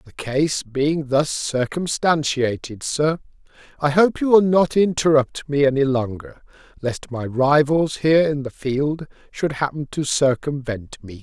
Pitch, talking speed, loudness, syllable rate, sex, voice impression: 145 Hz, 145 wpm, -20 LUFS, 4.1 syllables/s, male, masculine, slightly middle-aged, slightly muffled, slightly sincere, friendly